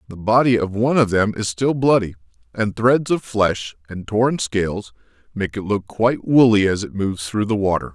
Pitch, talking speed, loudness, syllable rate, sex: 105 Hz, 205 wpm, -19 LUFS, 5.2 syllables/s, male